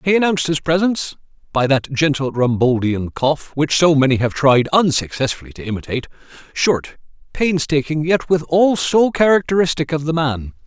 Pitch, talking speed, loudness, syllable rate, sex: 150 Hz, 140 wpm, -17 LUFS, 5.0 syllables/s, male